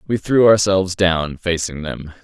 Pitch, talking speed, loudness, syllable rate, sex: 90 Hz, 160 wpm, -17 LUFS, 4.5 syllables/s, male